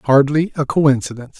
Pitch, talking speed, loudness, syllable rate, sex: 140 Hz, 130 wpm, -16 LUFS, 5.3 syllables/s, male